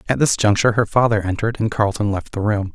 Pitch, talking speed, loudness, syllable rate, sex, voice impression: 105 Hz, 240 wpm, -18 LUFS, 6.6 syllables/s, male, masculine, adult-like, tensed, powerful, clear, fluent, cool, intellectual, calm, wild, lively, slightly sharp, modest